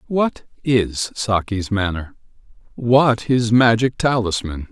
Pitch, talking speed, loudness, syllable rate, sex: 110 Hz, 100 wpm, -18 LUFS, 3.5 syllables/s, male